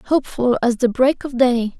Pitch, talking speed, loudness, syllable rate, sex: 250 Hz, 200 wpm, -18 LUFS, 4.6 syllables/s, female